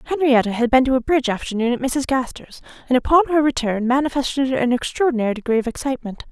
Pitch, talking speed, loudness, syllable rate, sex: 255 Hz, 190 wpm, -19 LUFS, 6.9 syllables/s, female